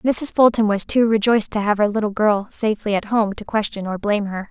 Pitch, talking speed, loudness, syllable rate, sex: 210 Hz, 240 wpm, -19 LUFS, 5.9 syllables/s, female